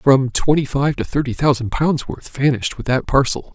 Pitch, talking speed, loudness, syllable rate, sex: 135 Hz, 205 wpm, -18 LUFS, 5.1 syllables/s, male